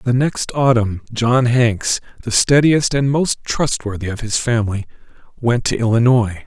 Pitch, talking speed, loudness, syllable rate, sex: 120 Hz, 150 wpm, -17 LUFS, 4.3 syllables/s, male